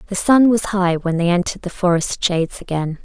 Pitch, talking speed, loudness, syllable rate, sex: 185 Hz, 215 wpm, -18 LUFS, 5.7 syllables/s, female